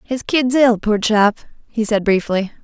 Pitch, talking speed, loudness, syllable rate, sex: 225 Hz, 180 wpm, -16 LUFS, 4.0 syllables/s, female